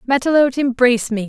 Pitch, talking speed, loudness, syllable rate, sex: 255 Hz, 140 wpm, -16 LUFS, 7.2 syllables/s, female